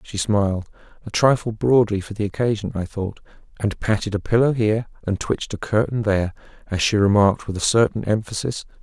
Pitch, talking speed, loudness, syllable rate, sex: 105 Hz, 185 wpm, -21 LUFS, 5.9 syllables/s, male